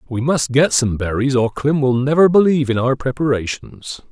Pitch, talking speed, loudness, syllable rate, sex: 130 Hz, 190 wpm, -16 LUFS, 5.1 syllables/s, male